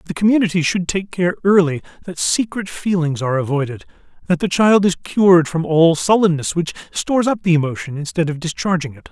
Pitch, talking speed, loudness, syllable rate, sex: 170 Hz, 185 wpm, -17 LUFS, 5.6 syllables/s, male